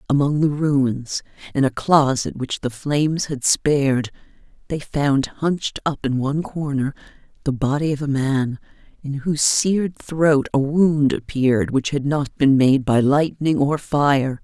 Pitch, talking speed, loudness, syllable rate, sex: 140 Hz, 160 wpm, -20 LUFS, 4.2 syllables/s, female